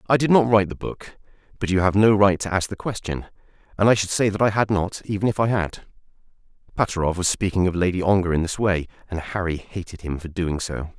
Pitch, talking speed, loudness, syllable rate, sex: 95 Hz, 230 wpm, -22 LUFS, 6.1 syllables/s, male